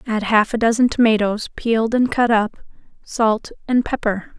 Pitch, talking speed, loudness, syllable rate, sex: 225 Hz, 165 wpm, -18 LUFS, 4.7 syllables/s, female